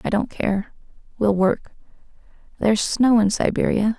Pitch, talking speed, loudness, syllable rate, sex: 215 Hz, 135 wpm, -20 LUFS, 4.6 syllables/s, female